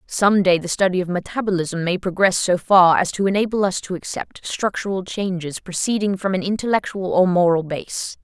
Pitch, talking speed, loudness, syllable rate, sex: 185 Hz, 180 wpm, -20 LUFS, 5.2 syllables/s, female